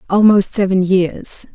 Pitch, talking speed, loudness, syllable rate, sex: 195 Hz, 115 wpm, -14 LUFS, 3.9 syllables/s, female